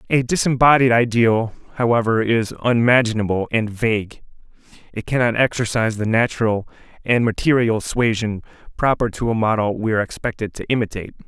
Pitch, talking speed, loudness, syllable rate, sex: 115 Hz, 135 wpm, -19 LUFS, 5.9 syllables/s, male